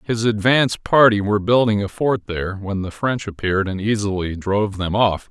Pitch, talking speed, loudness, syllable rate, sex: 105 Hz, 190 wpm, -19 LUFS, 5.5 syllables/s, male